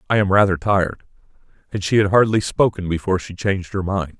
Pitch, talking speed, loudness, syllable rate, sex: 95 Hz, 200 wpm, -19 LUFS, 6.5 syllables/s, male